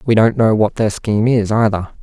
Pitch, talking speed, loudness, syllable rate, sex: 110 Hz, 235 wpm, -15 LUFS, 5.4 syllables/s, male